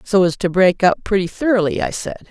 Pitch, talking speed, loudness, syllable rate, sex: 195 Hz, 235 wpm, -17 LUFS, 5.7 syllables/s, female